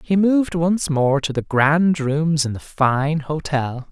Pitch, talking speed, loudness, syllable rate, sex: 150 Hz, 185 wpm, -19 LUFS, 3.7 syllables/s, male